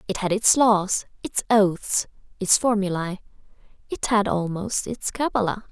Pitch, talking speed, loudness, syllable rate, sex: 200 Hz, 125 wpm, -22 LUFS, 4.2 syllables/s, female